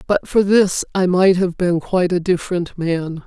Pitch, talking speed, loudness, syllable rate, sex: 180 Hz, 200 wpm, -17 LUFS, 4.6 syllables/s, female